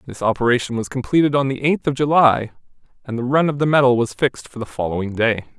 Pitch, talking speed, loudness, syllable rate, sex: 130 Hz, 225 wpm, -18 LUFS, 6.4 syllables/s, male